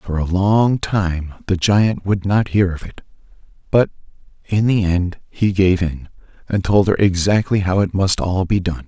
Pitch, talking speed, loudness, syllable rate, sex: 95 Hz, 190 wpm, -18 LUFS, 4.2 syllables/s, male